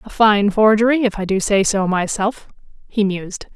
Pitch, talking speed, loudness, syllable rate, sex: 205 Hz, 185 wpm, -17 LUFS, 5.0 syllables/s, female